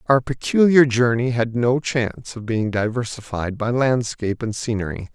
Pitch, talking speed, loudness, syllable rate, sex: 120 Hz, 150 wpm, -20 LUFS, 4.8 syllables/s, male